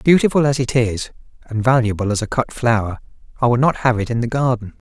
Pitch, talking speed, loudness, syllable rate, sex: 120 Hz, 220 wpm, -18 LUFS, 6.0 syllables/s, male